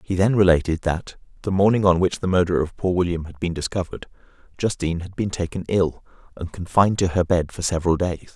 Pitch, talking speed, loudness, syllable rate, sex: 90 Hz, 210 wpm, -22 LUFS, 6.1 syllables/s, male